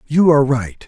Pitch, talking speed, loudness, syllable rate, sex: 135 Hz, 205 wpm, -15 LUFS, 5.5 syllables/s, male